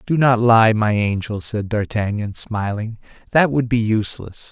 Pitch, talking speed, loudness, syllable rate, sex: 110 Hz, 160 wpm, -18 LUFS, 4.5 syllables/s, male